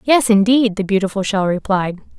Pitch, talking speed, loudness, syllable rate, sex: 205 Hz, 165 wpm, -16 LUFS, 5.2 syllables/s, female